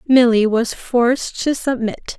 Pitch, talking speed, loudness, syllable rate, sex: 240 Hz, 140 wpm, -17 LUFS, 4.4 syllables/s, female